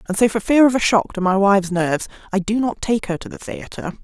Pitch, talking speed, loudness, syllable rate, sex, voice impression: 200 Hz, 280 wpm, -18 LUFS, 6.2 syllables/s, female, feminine, adult-like, tensed, powerful, slightly hard, fluent, raspy, intellectual, slightly wild, lively, intense